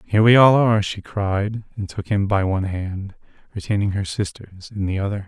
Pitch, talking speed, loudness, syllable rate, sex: 100 Hz, 205 wpm, -20 LUFS, 5.4 syllables/s, male